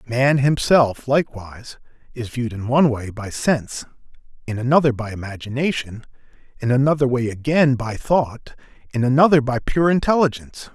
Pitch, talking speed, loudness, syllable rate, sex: 130 Hz, 140 wpm, -19 LUFS, 5.4 syllables/s, male